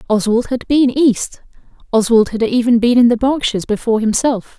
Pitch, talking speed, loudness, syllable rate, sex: 235 Hz, 170 wpm, -14 LUFS, 5.4 syllables/s, female